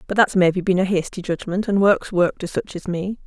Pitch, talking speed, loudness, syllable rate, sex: 185 Hz, 255 wpm, -20 LUFS, 5.6 syllables/s, female